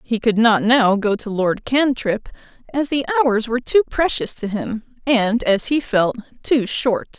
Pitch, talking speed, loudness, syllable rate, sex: 235 Hz, 185 wpm, -18 LUFS, 4.3 syllables/s, female